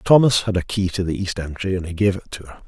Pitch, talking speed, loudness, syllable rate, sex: 95 Hz, 290 wpm, -21 LUFS, 5.9 syllables/s, male